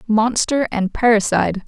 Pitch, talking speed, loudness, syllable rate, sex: 220 Hz, 105 wpm, -17 LUFS, 4.7 syllables/s, female